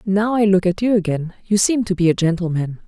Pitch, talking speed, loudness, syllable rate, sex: 190 Hz, 250 wpm, -18 LUFS, 5.8 syllables/s, female